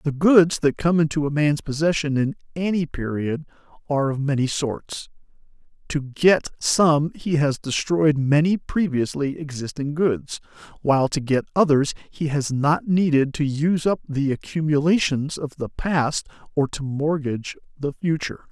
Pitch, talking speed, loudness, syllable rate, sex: 150 Hz, 150 wpm, -22 LUFS, 4.5 syllables/s, male